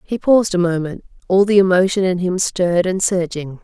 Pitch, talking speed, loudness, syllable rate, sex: 185 Hz, 200 wpm, -16 LUFS, 5.5 syllables/s, female